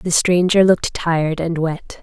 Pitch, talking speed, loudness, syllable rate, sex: 170 Hz, 175 wpm, -17 LUFS, 4.6 syllables/s, female